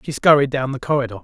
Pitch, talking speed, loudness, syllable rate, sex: 135 Hz, 240 wpm, -18 LUFS, 7.6 syllables/s, male